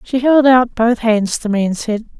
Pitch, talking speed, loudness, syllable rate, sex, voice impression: 230 Hz, 245 wpm, -14 LUFS, 4.6 syllables/s, female, feminine, middle-aged, slightly relaxed, soft, muffled, calm, reassuring, elegant, slightly modest